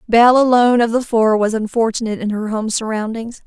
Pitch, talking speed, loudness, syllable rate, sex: 225 Hz, 190 wpm, -16 LUFS, 6.1 syllables/s, female